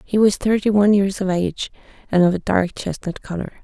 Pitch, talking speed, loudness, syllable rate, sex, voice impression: 195 Hz, 215 wpm, -19 LUFS, 5.9 syllables/s, female, very feminine, young, slightly adult-like, thin, slightly relaxed, weak, slightly dark, hard, slightly muffled, fluent, slightly raspy, cute, very intellectual, slightly refreshing, very sincere, very calm, friendly, reassuring, very unique, elegant, wild, very sweet, very kind, very modest, light